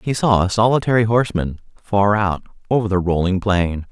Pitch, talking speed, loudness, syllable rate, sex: 100 Hz, 170 wpm, -18 LUFS, 5.5 syllables/s, male